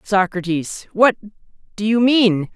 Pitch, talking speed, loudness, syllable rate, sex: 205 Hz, 120 wpm, -17 LUFS, 3.9 syllables/s, male